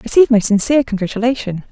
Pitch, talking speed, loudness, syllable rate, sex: 230 Hz, 140 wpm, -15 LUFS, 7.4 syllables/s, female